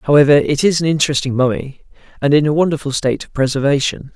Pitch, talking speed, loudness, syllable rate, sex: 145 Hz, 190 wpm, -15 LUFS, 6.7 syllables/s, male